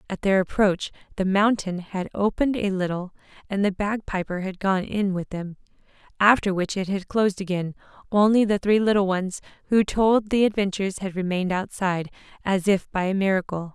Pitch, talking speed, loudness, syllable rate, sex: 195 Hz, 175 wpm, -23 LUFS, 5.5 syllables/s, female